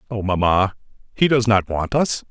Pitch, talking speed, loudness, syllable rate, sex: 105 Hz, 180 wpm, -19 LUFS, 4.7 syllables/s, male